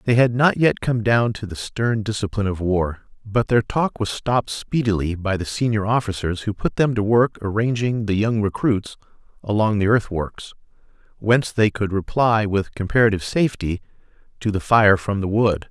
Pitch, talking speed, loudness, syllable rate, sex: 105 Hz, 180 wpm, -20 LUFS, 5.1 syllables/s, male